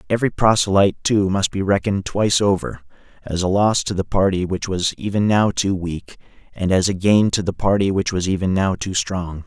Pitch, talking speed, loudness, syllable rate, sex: 95 Hz, 210 wpm, -19 LUFS, 5.4 syllables/s, male